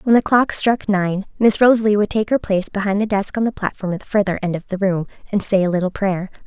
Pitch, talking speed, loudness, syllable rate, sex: 200 Hz, 270 wpm, -18 LUFS, 6.1 syllables/s, female